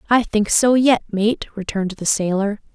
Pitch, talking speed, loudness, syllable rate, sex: 215 Hz, 175 wpm, -18 LUFS, 4.9 syllables/s, female